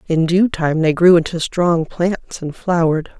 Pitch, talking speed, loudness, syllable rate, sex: 170 Hz, 190 wpm, -16 LUFS, 4.3 syllables/s, female